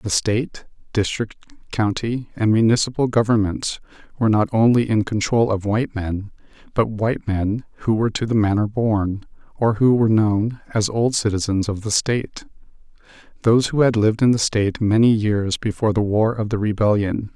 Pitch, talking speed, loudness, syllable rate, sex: 110 Hz, 165 wpm, -20 LUFS, 5.4 syllables/s, male